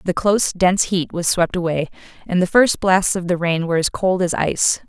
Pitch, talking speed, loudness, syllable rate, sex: 180 Hz, 235 wpm, -18 LUFS, 5.6 syllables/s, female